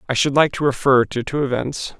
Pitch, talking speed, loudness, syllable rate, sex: 135 Hz, 240 wpm, -19 LUFS, 5.5 syllables/s, male